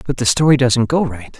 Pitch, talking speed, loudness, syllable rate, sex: 130 Hz, 260 wpm, -15 LUFS, 5.5 syllables/s, male